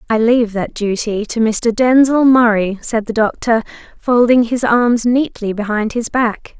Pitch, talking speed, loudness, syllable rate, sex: 230 Hz, 165 wpm, -14 LUFS, 4.3 syllables/s, female